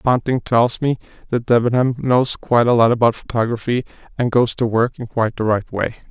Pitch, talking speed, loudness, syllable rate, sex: 120 Hz, 195 wpm, -18 LUFS, 5.5 syllables/s, male